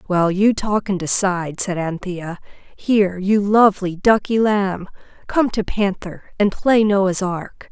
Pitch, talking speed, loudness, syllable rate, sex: 195 Hz, 150 wpm, -18 LUFS, 4.0 syllables/s, female